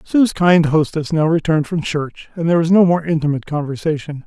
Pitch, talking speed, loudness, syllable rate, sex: 160 Hz, 195 wpm, -17 LUFS, 5.9 syllables/s, male